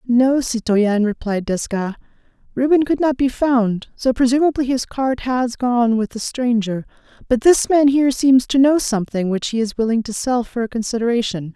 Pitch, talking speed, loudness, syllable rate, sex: 240 Hz, 180 wpm, -18 LUFS, 4.9 syllables/s, female